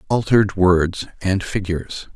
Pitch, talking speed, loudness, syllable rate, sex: 95 Hz, 110 wpm, -19 LUFS, 4.4 syllables/s, male